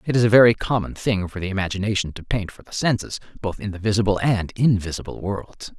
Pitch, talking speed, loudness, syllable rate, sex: 100 Hz, 220 wpm, -22 LUFS, 6.1 syllables/s, male